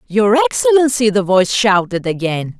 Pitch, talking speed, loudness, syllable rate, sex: 215 Hz, 140 wpm, -14 LUFS, 4.9 syllables/s, female